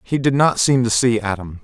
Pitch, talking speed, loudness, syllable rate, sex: 115 Hz, 255 wpm, -17 LUFS, 5.2 syllables/s, male